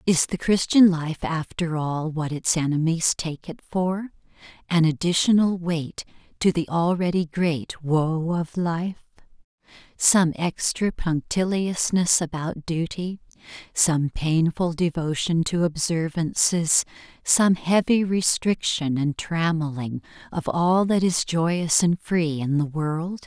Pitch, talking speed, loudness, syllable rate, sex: 165 Hz, 120 wpm, -23 LUFS, 3.7 syllables/s, female